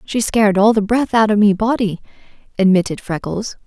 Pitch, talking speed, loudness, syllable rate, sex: 210 Hz, 180 wpm, -16 LUFS, 5.5 syllables/s, female